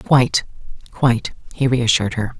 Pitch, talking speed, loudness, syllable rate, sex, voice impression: 120 Hz, 100 wpm, -18 LUFS, 5.3 syllables/s, female, very feminine, very middle-aged, slightly thin, tensed, very powerful, slightly bright, slightly soft, clear, fluent, slightly raspy, slightly cool, intellectual, refreshing, sincere, calm, slightly friendly, reassuring, unique, elegant, slightly wild, slightly sweet, lively, kind, slightly intense, sharp